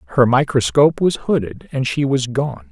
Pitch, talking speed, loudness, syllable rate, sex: 125 Hz, 175 wpm, -17 LUFS, 5.2 syllables/s, male